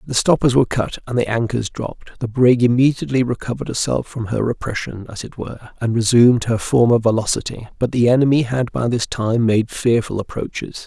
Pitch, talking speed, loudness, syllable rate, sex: 120 Hz, 190 wpm, -18 LUFS, 5.9 syllables/s, male